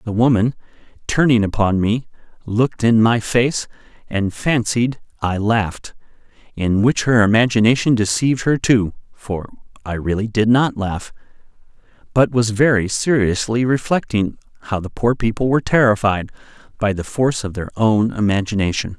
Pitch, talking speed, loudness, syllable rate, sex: 110 Hz, 140 wpm, -18 LUFS, 5.0 syllables/s, male